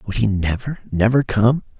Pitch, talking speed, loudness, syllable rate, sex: 110 Hz, 165 wpm, -19 LUFS, 4.6 syllables/s, male